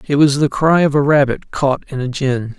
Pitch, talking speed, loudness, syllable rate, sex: 140 Hz, 255 wpm, -15 LUFS, 5.0 syllables/s, male